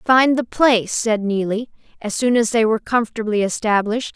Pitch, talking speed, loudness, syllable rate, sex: 225 Hz, 175 wpm, -18 LUFS, 5.5 syllables/s, female